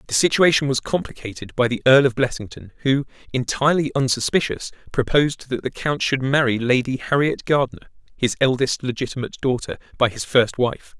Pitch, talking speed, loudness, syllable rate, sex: 130 Hz, 160 wpm, -20 LUFS, 5.8 syllables/s, male